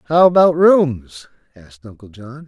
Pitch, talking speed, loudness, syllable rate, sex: 140 Hz, 145 wpm, -13 LUFS, 4.5 syllables/s, male